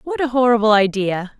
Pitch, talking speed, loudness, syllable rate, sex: 230 Hz, 175 wpm, -16 LUFS, 5.6 syllables/s, female